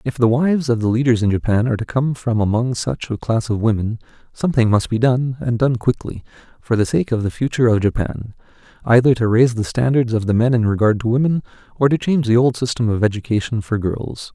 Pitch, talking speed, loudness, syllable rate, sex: 120 Hz, 230 wpm, -18 LUFS, 6.1 syllables/s, male